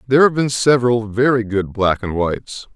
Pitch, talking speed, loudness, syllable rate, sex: 115 Hz, 195 wpm, -17 LUFS, 5.4 syllables/s, male